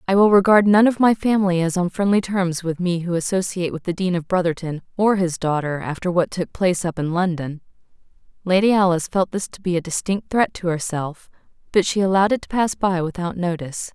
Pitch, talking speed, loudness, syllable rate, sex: 180 Hz, 215 wpm, -20 LUFS, 5.9 syllables/s, female